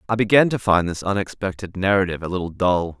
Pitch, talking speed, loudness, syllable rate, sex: 95 Hz, 200 wpm, -20 LUFS, 6.4 syllables/s, male